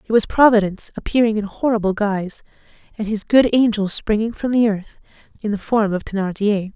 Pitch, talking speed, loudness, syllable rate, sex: 215 Hz, 180 wpm, -18 LUFS, 5.7 syllables/s, female